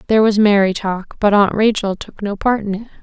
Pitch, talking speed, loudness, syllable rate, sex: 205 Hz, 240 wpm, -16 LUFS, 5.8 syllables/s, female